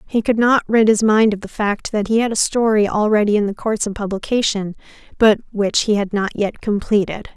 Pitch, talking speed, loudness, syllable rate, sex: 210 Hz, 220 wpm, -17 LUFS, 5.5 syllables/s, female